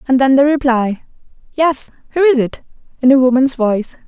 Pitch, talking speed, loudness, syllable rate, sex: 260 Hz, 175 wpm, -14 LUFS, 5.5 syllables/s, female